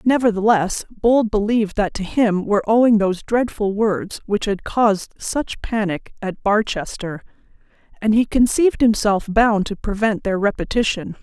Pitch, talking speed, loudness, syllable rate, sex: 210 Hz, 140 wpm, -19 LUFS, 4.7 syllables/s, female